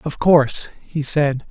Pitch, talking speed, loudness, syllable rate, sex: 145 Hz, 160 wpm, -17 LUFS, 3.9 syllables/s, male